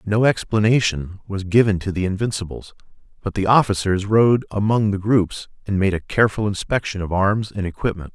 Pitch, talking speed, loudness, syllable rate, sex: 100 Hz, 170 wpm, -20 LUFS, 5.4 syllables/s, male